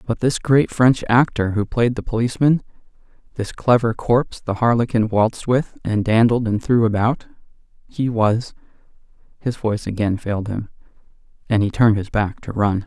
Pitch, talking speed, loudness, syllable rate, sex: 115 Hz, 155 wpm, -19 LUFS, 5.1 syllables/s, male